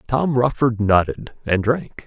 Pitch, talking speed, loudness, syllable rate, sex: 120 Hz, 145 wpm, -19 LUFS, 3.8 syllables/s, male